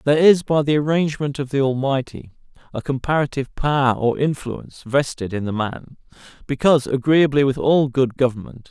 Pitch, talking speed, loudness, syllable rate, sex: 135 Hz, 160 wpm, -19 LUFS, 5.6 syllables/s, male